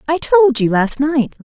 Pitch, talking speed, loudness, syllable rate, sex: 270 Hz, 205 wpm, -14 LUFS, 4.1 syllables/s, female